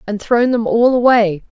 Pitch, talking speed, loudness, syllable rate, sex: 225 Hz, 190 wpm, -14 LUFS, 4.5 syllables/s, female